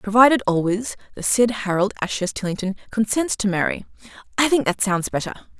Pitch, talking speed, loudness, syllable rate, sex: 210 Hz, 160 wpm, -21 LUFS, 5.6 syllables/s, female